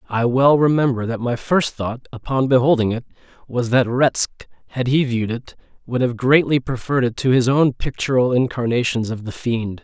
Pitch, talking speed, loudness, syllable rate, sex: 125 Hz, 185 wpm, -19 LUFS, 5.2 syllables/s, male